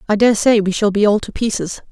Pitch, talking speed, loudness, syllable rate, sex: 210 Hz, 285 wpm, -16 LUFS, 6.0 syllables/s, female